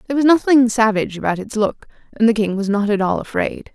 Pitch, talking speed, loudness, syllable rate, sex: 225 Hz, 240 wpm, -17 LUFS, 6.3 syllables/s, female